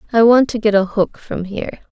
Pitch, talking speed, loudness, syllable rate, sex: 215 Hz, 250 wpm, -16 LUFS, 5.8 syllables/s, female